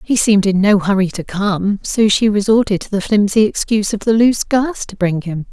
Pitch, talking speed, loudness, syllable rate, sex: 205 Hz, 230 wpm, -15 LUFS, 5.4 syllables/s, female